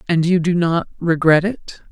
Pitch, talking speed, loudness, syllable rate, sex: 170 Hz, 190 wpm, -17 LUFS, 4.5 syllables/s, female